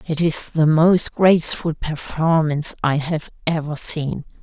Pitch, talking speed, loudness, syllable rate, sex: 160 Hz, 135 wpm, -19 LUFS, 4.1 syllables/s, female